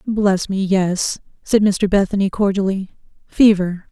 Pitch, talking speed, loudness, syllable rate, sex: 195 Hz, 105 wpm, -17 LUFS, 5.2 syllables/s, female